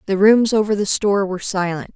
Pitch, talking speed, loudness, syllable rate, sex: 200 Hz, 215 wpm, -17 LUFS, 6.2 syllables/s, female